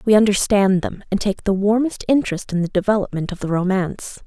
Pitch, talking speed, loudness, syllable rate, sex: 200 Hz, 195 wpm, -19 LUFS, 5.9 syllables/s, female